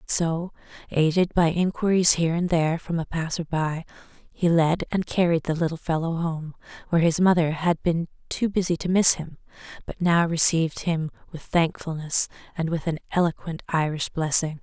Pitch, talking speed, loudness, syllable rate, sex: 165 Hz, 170 wpm, -24 LUFS, 5.0 syllables/s, female